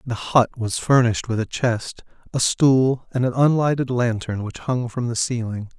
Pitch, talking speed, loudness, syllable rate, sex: 120 Hz, 185 wpm, -21 LUFS, 4.6 syllables/s, male